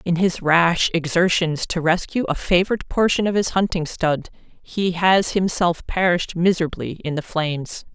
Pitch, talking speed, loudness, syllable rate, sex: 175 Hz, 160 wpm, -20 LUFS, 4.7 syllables/s, female